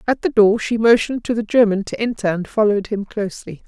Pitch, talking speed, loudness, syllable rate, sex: 215 Hz, 230 wpm, -18 LUFS, 6.3 syllables/s, female